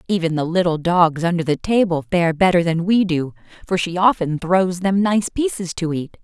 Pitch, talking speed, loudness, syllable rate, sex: 175 Hz, 200 wpm, -18 LUFS, 5.0 syllables/s, female